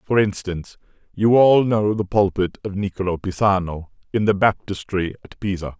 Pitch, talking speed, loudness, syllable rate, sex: 100 Hz, 155 wpm, -20 LUFS, 5.1 syllables/s, male